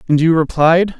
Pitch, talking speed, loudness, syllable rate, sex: 165 Hz, 180 wpm, -13 LUFS, 5.1 syllables/s, male